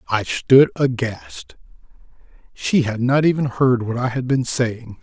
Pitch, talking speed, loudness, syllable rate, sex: 120 Hz, 155 wpm, -18 LUFS, 4.0 syllables/s, male